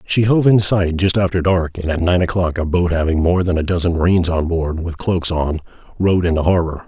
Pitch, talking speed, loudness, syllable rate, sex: 85 Hz, 235 wpm, -17 LUFS, 5.6 syllables/s, male